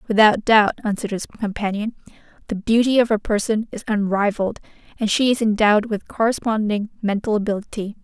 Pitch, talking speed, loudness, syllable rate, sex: 215 Hz, 150 wpm, -20 LUFS, 5.9 syllables/s, female